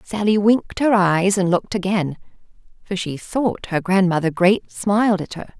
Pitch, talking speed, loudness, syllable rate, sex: 190 Hz, 170 wpm, -19 LUFS, 4.8 syllables/s, female